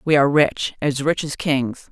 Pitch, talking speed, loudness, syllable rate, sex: 145 Hz, 220 wpm, -20 LUFS, 4.6 syllables/s, female